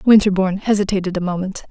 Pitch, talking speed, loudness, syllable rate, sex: 195 Hz, 140 wpm, -18 LUFS, 7.0 syllables/s, female